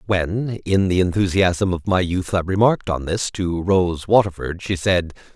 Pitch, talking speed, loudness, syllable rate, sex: 90 Hz, 180 wpm, -20 LUFS, 4.4 syllables/s, male